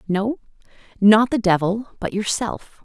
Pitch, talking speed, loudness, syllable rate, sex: 210 Hz, 125 wpm, -20 LUFS, 4.1 syllables/s, female